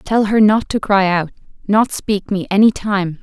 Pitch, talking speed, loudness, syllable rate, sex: 200 Hz, 205 wpm, -15 LUFS, 4.3 syllables/s, female